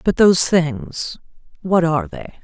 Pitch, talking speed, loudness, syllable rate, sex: 165 Hz, 125 wpm, -17 LUFS, 4.4 syllables/s, female